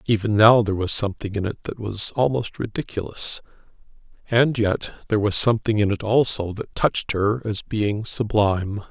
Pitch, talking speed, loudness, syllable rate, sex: 105 Hz, 160 wpm, -22 LUFS, 5.3 syllables/s, male